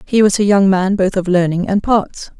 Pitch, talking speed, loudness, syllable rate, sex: 195 Hz, 250 wpm, -14 LUFS, 4.9 syllables/s, female